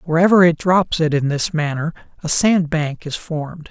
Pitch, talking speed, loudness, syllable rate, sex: 160 Hz, 195 wpm, -17 LUFS, 4.9 syllables/s, male